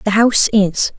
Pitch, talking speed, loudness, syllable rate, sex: 210 Hz, 180 wpm, -13 LUFS, 5.1 syllables/s, female